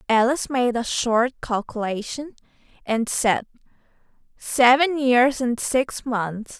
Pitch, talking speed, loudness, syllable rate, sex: 245 Hz, 110 wpm, -21 LUFS, 3.6 syllables/s, female